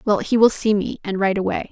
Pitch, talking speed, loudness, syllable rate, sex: 205 Hz, 280 wpm, -19 LUFS, 5.9 syllables/s, female